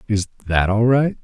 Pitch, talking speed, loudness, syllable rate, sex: 110 Hz, 195 wpm, -18 LUFS, 4.8 syllables/s, male